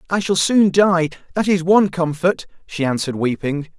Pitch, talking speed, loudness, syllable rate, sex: 170 Hz, 175 wpm, -18 LUFS, 5.2 syllables/s, male